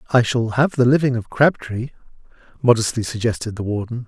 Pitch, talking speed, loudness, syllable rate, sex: 120 Hz, 160 wpm, -19 LUFS, 5.7 syllables/s, male